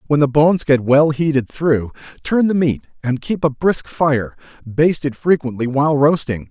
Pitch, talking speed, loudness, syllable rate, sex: 145 Hz, 175 wpm, -17 LUFS, 4.9 syllables/s, male